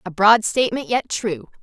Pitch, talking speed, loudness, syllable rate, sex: 215 Hz, 185 wpm, -19 LUFS, 4.9 syllables/s, female